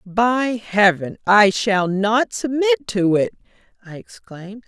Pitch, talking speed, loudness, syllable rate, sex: 215 Hz, 130 wpm, -18 LUFS, 3.8 syllables/s, female